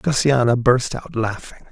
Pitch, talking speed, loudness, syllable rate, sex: 125 Hz, 140 wpm, -19 LUFS, 4.3 syllables/s, male